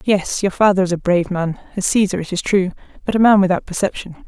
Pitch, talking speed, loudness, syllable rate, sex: 190 Hz, 225 wpm, -17 LUFS, 6.4 syllables/s, female